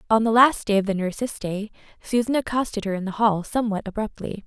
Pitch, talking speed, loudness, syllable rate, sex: 215 Hz, 215 wpm, -23 LUFS, 6.0 syllables/s, female